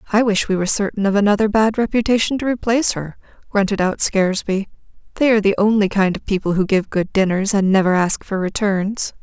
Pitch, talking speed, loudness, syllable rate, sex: 205 Hz, 200 wpm, -17 LUFS, 6.1 syllables/s, female